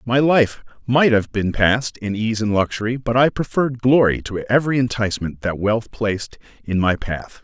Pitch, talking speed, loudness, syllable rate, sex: 115 Hz, 185 wpm, -19 LUFS, 5.1 syllables/s, male